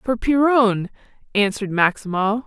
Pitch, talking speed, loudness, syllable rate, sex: 220 Hz, 95 wpm, -19 LUFS, 4.7 syllables/s, female